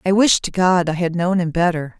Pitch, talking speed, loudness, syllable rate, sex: 175 Hz, 270 wpm, -17 LUFS, 5.4 syllables/s, female